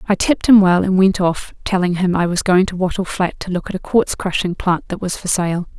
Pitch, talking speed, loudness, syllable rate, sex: 185 Hz, 270 wpm, -17 LUFS, 5.5 syllables/s, female